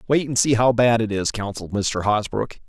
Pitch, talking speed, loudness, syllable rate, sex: 115 Hz, 225 wpm, -21 LUFS, 5.2 syllables/s, male